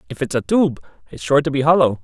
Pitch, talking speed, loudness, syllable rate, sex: 140 Hz, 265 wpm, -18 LUFS, 6.6 syllables/s, male